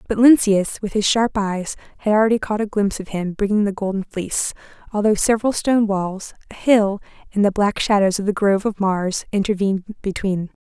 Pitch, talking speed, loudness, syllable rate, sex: 205 Hz, 190 wpm, -19 LUFS, 5.7 syllables/s, female